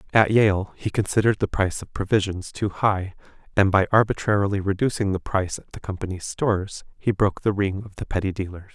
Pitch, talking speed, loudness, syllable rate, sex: 100 Hz, 190 wpm, -23 LUFS, 6.0 syllables/s, male